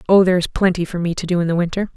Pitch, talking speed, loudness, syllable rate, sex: 175 Hz, 335 wpm, -18 LUFS, 8.0 syllables/s, female